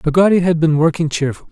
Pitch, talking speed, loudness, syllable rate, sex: 160 Hz, 195 wpm, -15 LUFS, 6.9 syllables/s, male